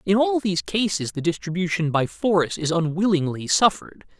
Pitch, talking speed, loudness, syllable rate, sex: 180 Hz, 155 wpm, -22 LUFS, 5.5 syllables/s, male